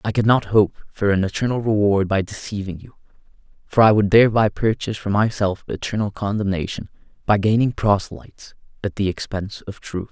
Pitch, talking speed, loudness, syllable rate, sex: 105 Hz, 165 wpm, -20 LUFS, 5.7 syllables/s, male